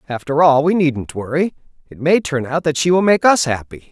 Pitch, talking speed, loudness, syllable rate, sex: 155 Hz, 215 wpm, -16 LUFS, 5.3 syllables/s, male